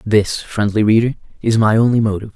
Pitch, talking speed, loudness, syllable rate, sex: 110 Hz, 180 wpm, -16 LUFS, 6.0 syllables/s, male